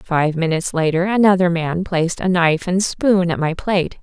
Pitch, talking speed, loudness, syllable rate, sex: 175 Hz, 195 wpm, -17 LUFS, 5.3 syllables/s, female